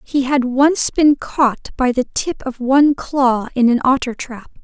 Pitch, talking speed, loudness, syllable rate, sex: 260 Hz, 195 wpm, -16 LUFS, 4.1 syllables/s, female